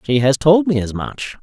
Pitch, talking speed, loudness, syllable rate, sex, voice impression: 145 Hz, 250 wpm, -16 LUFS, 4.8 syllables/s, male, masculine, adult-like, slightly fluent, slightly cool, sincere, friendly